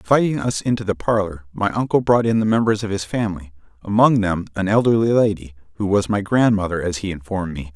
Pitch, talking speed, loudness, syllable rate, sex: 100 Hz, 210 wpm, -19 LUFS, 6.3 syllables/s, male